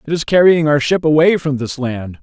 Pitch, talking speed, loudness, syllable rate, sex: 145 Hz, 245 wpm, -14 LUFS, 5.3 syllables/s, male